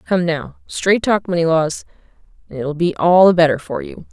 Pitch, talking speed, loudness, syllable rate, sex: 170 Hz, 160 wpm, -16 LUFS, 5.0 syllables/s, female